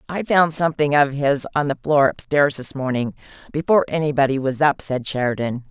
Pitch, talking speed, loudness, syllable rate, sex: 140 Hz, 190 wpm, -20 LUFS, 5.6 syllables/s, female